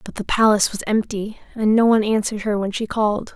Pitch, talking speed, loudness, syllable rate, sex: 215 Hz, 235 wpm, -19 LUFS, 6.5 syllables/s, female